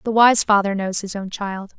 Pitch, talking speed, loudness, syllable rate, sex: 205 Hz, 235 wpm, -19 LUFS, 4.9 syllables/s, female